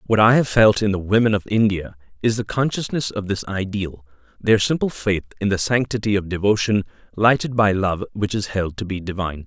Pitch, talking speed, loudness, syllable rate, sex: 100 Hz, 195 wpm, -20 LUFS, 5.5 syllables/s, male